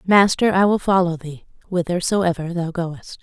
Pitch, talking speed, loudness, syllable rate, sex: 175 Hz, 150 wpm, -19 LUFS, 4.5 syllables/s, female